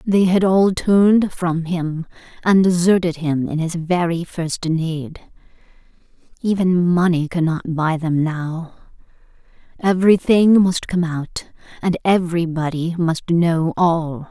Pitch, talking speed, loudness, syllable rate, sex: 170 Hz, 125 wpm, -18 LUFS, 3.9 syllables/s, female